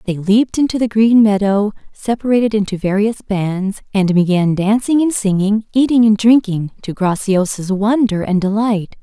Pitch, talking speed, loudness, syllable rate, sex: 210 Hz, 155 wpm, -15 LUFS, 4.8 syllables/s, female